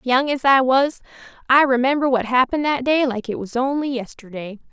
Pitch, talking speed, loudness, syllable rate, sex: 260 Hz, 190 wpm, -19 LUFS, 5.5 syllables/s, female